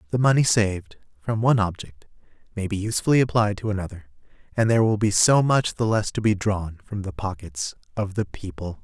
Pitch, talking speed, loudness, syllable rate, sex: 100 Hz, 195 wpm, -23 LUFS, 5.9 syllables/s, male